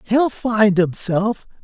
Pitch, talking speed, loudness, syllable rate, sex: 215 Hz, 110 wpm, -18 LUFS, 2.8 syllables/s, male